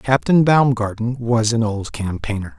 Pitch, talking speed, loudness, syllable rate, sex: 120 Hz, 140 wpm, -18 LUFS, 4.3 syllables/s, male